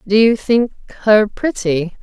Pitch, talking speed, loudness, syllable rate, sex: 210 Hz, 150 wpm, -15 LUFS, 3.9 syllables/s, female